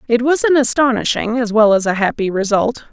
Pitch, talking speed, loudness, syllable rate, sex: 230 Hz, 205 wpm, -15 LUFS, 5.5 syllables/s, female